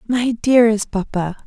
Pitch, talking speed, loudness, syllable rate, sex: 220 Hz, 125 wpm, -17 LUFS, 5.1 syllables/s, female